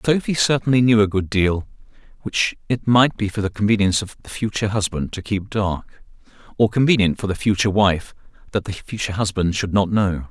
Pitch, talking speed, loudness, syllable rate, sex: 105 Hz, 185 wpm, -20 LUFS, 5.7 syllables/s, male